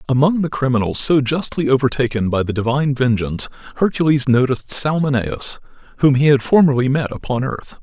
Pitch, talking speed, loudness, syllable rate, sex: 135 Hz, 155 wpm, -17 LUFS, 5.8 syllables/s, male